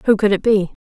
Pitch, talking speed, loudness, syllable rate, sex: 205 Hz, 285 wpm, -16 LUFS, 6.4 syllables/s, female